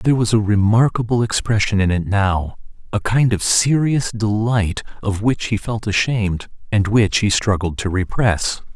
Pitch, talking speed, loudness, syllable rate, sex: 105 Hz, 165 wpm, -18 LUFS, 4.6 syllables/s, male